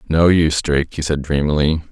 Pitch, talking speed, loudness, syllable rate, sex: 75 Hz, 190 wpm, -17 LUFS, 5.9 syllables/s, male